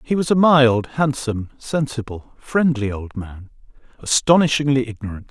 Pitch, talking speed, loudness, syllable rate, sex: 130 Hz, 125 wpm, -18 LUFS, 4.8 syllables/s, male